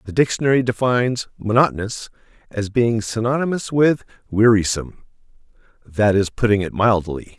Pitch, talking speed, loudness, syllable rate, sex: 115 Hz, 115 wpm, -19 LUFS, 5.2 syllables/s, male